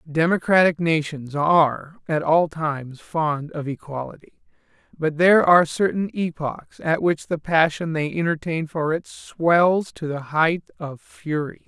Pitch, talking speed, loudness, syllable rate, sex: 160 Hz, 145 wpm, -21 LUFS, 4.2 syllables/s, male